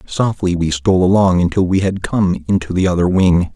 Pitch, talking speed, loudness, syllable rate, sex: 90 Hz, 205 wpm, -15 LUFS, 5.3 syllables/s, male